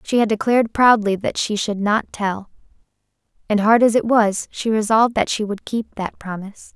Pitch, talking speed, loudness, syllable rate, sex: 215 Hz, 195 wpm, -18 LUFS, 5.1 syllables/s, female